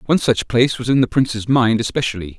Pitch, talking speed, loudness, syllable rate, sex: 120 Hz, 225 wpm, -17 LUFS, 6.7 syllables/s, male